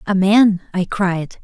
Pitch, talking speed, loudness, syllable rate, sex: 195 Hz, 165 wpm, -16 LUFS, 3.5 syllables/s, female